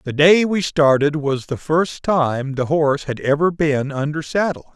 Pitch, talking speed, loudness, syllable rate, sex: 150 Hz, 190 wpm, -18 LUFS, 4.3 syllables/s, male